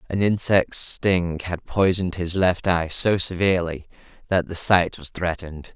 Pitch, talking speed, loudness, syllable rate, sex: 90 Hz, 155 wpm, -21 LUFS, 4.5 syllables/s, male